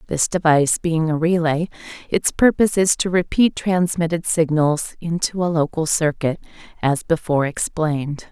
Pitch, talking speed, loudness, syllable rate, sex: 165 Hz, 135 wpm, -19 LUFS, 4.9 syllables/s, female